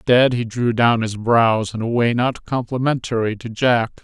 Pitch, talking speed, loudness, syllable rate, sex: 120 Hz, 195 wpm, -19 LUFS, 4.6 syllables/s, male